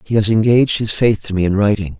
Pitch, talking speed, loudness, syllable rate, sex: 105 Hz, 270 wpm, -15 LUFS, 6.4 syllables/s, male